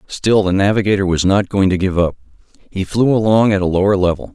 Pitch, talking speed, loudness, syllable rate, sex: 100 Hz, 220 wpm, -15 LUFS, 6.0 syllables/s, male